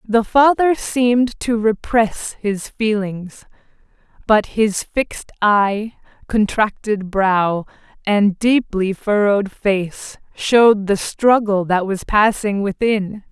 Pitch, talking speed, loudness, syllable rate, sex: 210 Hz, 110 wpm, -17 LUFS, 3.3 syllables/s, female